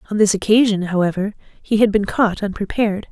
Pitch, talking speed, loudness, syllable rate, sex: 205 Hz, 175 wpm, -18 LUFS, 6.0 syllables/s, female